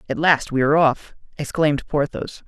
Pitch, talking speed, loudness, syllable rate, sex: 145 Hz, 170 wpm, -19 LUFS, 5.3 syllables/s, male